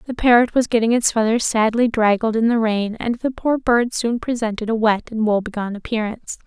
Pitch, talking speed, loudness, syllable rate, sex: 225 Hz, 205 wpm, -19 LUFS, 5.6 syllables/s, female